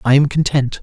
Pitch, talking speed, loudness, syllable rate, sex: 135 Hz, 220 wpm, -15 LUFS, 5.5 syllables/s, male